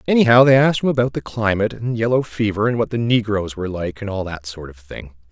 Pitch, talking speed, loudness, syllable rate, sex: 105 Hz, 250 wpm, -18 LUFS, 6.4 syllables/s, male